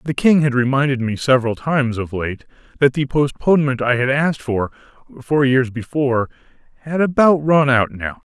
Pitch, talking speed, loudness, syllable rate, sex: 135 Hz, 175 wpm, -17 LUFS, 5.3 syllables/s, male